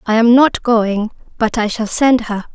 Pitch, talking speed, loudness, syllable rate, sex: 225 Hz, 215 wpm, -14 LUFS, 4.3 syllables/s, female